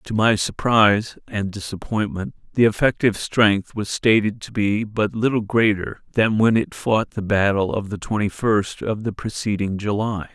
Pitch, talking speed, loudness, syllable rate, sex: 105 Hz, 170 wpm, -21 LUFS, 4.6 syllables/s, male